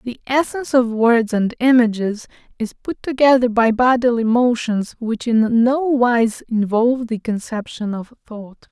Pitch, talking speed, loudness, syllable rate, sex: 235 Hz, 145 wpm, -17 LUFS, 4.3 syllables/s, female